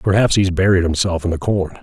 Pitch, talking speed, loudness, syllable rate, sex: 90 Hz, 230 wpm, -17 LUFS, 5.9 syllables/s, male